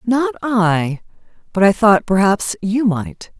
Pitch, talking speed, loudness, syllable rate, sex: 205 Hz, 140 wpm, -16 LUFS, 3.5 syllables/s, female